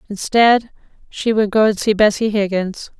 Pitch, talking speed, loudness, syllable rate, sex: 210 Hz, 160 wpm, -16 LUFS, 4.6 syllables/s, female